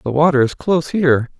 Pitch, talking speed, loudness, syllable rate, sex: 140 Hz, 215 wpm, -16 LUFS, 6.5 syllables/s, male